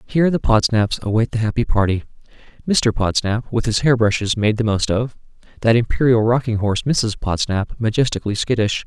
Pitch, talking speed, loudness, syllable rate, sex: 115 Hz, 170 wpm, -18 LUFS, 5.5 syllables/s, male